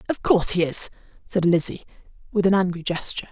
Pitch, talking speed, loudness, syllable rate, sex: 185 Hz, 180 wpm, -21 LUFS, 6.6 syllables/s, female